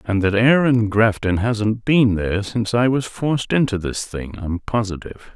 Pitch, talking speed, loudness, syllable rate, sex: 110 Hz, 180 wpm, -19 LUFS, 4.8 syllables/s, male